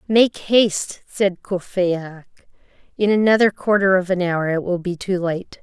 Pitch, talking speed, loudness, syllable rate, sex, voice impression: 190 Hz, 160 wpm, -19 LUFS, 4.6 syllables/s, female, very feminine, slightly young, adult-like, thin, slightly tensed, slightly powerful, slightly dark, soft, slightly muffled, fluent, very cute, intellectual, refreshing, sincere, very calm, very friendly, very reassuring, very unique, elegant, slightly wild, very sweet, lively, slightly strict, slightly intense, slightly sharp, slightly light